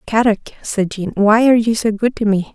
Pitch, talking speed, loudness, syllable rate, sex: 215 Hz, 235 wpm, -16 LUFS, 5.3 syllables/s, female